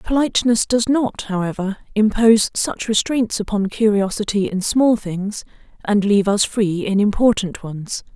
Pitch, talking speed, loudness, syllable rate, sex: 210 Hz, 140 wpm, -18 LUFS, 4.6 syllables/s, female